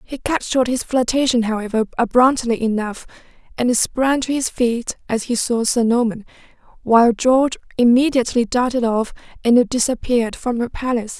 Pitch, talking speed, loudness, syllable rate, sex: 240 Hz, 150 wpm, -18 LUFS, 5.2 syllables/s, female